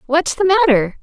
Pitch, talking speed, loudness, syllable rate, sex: 305 Hz, 175 wpm, -14 LUFS, 5.2 syllables/s, female